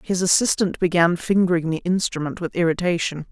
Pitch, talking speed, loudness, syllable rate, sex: 175 Hz, 145 wpm, -20 LUFS, 5.6 syllables/s, female